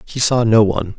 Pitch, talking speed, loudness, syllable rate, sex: 105 Hz, 245 wpm, -15 LUFS, 5.8 syllables/s, male